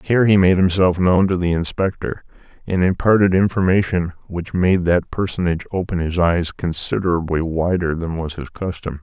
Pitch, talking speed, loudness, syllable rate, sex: 90 Hz, 160 wpm, -18 LUFS, 5.2 syllables/s, male